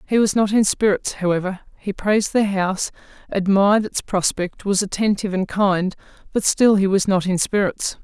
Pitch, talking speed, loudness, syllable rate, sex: 195 Hz, 180 wpm, -19 LUFS, 5.3 syllables/s, female